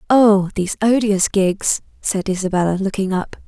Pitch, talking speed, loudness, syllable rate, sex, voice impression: 200 Hz, 140 wpm, -18 LUFS, 4.8 syllables/s, female, very feminine, slightly young, slightly adult-like, very thin, tensed, slightly weak, very bright, hard, very clear, very fluent, very cute, intellectual, very refreshing, very sincere, calm, very friendly, very reassuring, very unique, very elegant, slightly wild, sweet, lively, very kind, slightly sharp, modest